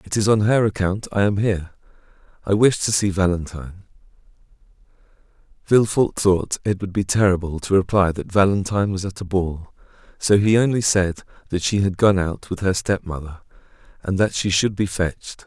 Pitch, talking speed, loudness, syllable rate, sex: 95 Hz, 180 wpm, -20 LUFS, 5.5 syllables/s, male